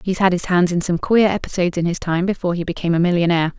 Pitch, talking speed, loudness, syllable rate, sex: 180 Hz, 270 wpm, -18 LUFS, 7.5 syllables/s, female